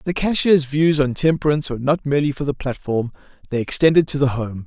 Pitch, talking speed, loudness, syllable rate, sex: 140 Hz, 205 wpm, -19 LUFS, 6.3 syllables/s, male